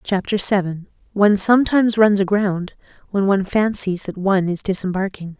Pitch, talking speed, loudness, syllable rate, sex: 195 Hz, 135 wpm, -18 LUFS, 5.5 syllables/s, female